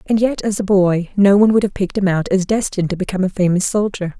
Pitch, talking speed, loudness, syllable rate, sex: 195 Hz, 270 wpm, -16 LUFS, 6.7 syllables/s, female